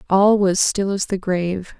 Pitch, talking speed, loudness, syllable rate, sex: 190 Hz, 200 wpm, -18 LUFS, 4.4 syllables/s, female